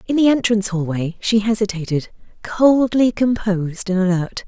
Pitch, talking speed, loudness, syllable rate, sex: 205 Hz, 135 wpm, -18 LUFS, 5.0 syllables/s, female